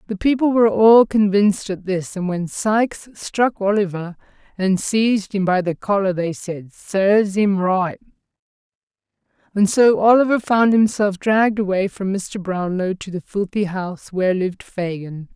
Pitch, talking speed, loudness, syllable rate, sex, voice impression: 200 Hz, 155 wpm, -18 LUFS, 4.7 syllables/s, female, very feminine, adult-like, intellectual